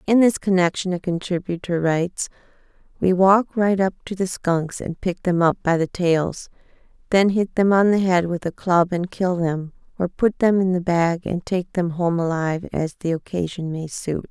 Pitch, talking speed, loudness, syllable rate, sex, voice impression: 180 Hz, 200 wpm, -21 LUFS, 4.7 syllables/s, female, feminine, adult-like, slightly dark, slightly calm, slightly elegant, slightly kind